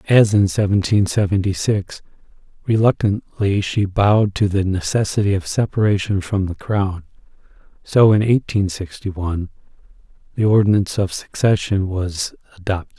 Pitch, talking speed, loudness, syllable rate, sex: 100 Hz, 125 wpm, -18 LUFS, 4.9 syllables/s, male